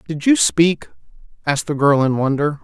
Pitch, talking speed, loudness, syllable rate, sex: 150 Hz, 180 wpm, -17 LUFS, 5.2 syllables/s, male